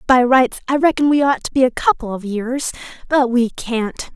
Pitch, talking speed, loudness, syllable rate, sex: 250 Hz, 215 wpm, -17 LUFS, 4.8 syllables/s, female